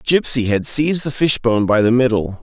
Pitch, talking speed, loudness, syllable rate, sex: 125 Hz, 200 wpm, -16 LUFS, 5.6 syllables/s, male